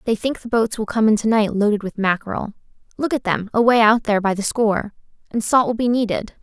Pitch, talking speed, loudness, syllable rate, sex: 220 Hz, 215 wpm, -19 LUFS, 6.1 syllables/s, female